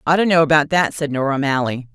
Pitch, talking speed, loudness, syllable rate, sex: 150 Hz, 245 wpm, -17 LUFS, 6.7 syllables/s, female